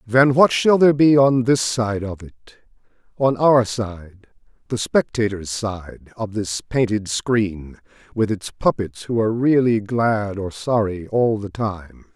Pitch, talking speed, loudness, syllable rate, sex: 110 Hz, 155 wpm, -19 LUFS, 3.9 syllables/s, male